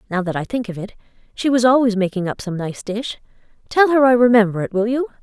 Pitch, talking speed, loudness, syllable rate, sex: 225 Hz, 240 wpm, -18 LUFS, 6.1 syllables/s, female